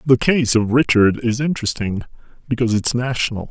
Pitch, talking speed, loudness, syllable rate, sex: 120 Hz, 155 wpm, -18 LUFS, 5.7 syllables/s, male